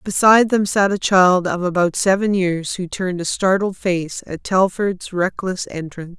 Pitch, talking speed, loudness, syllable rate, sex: 185 Hz, 175 wpm, -18 LUFS, 4.6 syllables/s, female